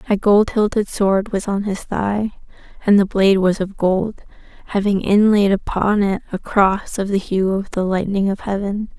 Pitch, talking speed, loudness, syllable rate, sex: 200 Hz, 185 wpm, -18 LUFS, 4.6 syllables/s, female